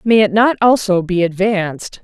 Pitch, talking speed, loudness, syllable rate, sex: 200 Hz, 175 wpm, -14 LUFS, 4.8 syllables/s, female